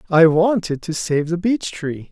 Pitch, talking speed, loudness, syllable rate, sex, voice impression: 170 Hz, 200 wpm, -19 LUFS, 4.2 syllables/s, male, masculine, adult-like, soft, slightly sincere, calm, friendly, reassuring, kind